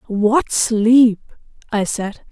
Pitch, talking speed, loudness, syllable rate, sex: 225 Hz, 105 wpm, -16 LUFS, 2.5 syllables/s, female